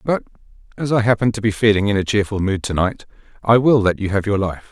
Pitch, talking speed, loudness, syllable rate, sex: 105 Hz, 255 wpm, -18 LUFS, 6.3 syllables/s, male